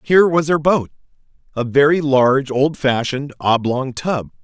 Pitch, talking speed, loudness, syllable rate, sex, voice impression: 140 Hz, 135 wpm, -17 LUFS, 4.8 syllables/s, male, masculine, adult-like, thick, powerful, slightly bright, clear, slightly halting, slightly cool, friendly, wild, lively, slightly sharp